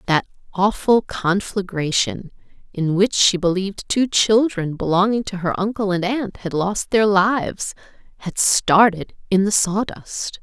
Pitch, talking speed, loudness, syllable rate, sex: 195 Hz, 140 wpm, -19 LUFS, 4.2 syllables/s, female